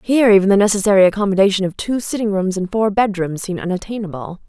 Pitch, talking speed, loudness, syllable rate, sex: 200 Hz, 200 wpm, -16 LUFS, 6.9 syllables/s, female